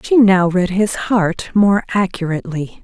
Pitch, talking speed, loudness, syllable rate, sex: 190 Hz, 150 wpm, -16 LUFS, 4.3 syllables/s, female